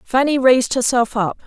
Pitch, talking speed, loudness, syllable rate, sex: 250 Hz, 165 wpm, -16 LUFS, 5.2 syllables/s, female